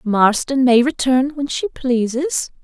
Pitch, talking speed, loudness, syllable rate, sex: 260 Hz, 135 wpm, -17 LUFS, 3.8 syllables/s, female